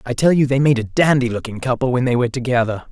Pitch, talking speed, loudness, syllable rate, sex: 125 Hz, 270 wpm, -17 LUFS, 6.8 syllables/s, male